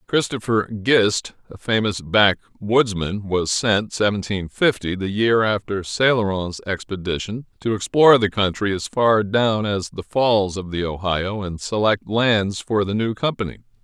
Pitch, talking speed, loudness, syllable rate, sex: 105 Hz, 145 wpm, -20 LUFS, 4.1 syllables/s, male